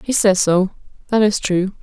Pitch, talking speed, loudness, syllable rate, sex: 200 Hz, 195 wpm, -17 LUFS, 4.5 syllables/s, female